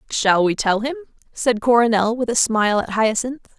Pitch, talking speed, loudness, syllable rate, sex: 230 Hz, 185 wpm, -18 LUFS, 5.1 syllables/s, female